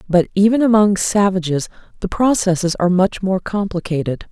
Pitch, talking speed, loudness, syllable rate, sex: 190 Hz, 140 wpm, -16 LUFS, 5.3 syllables/s, female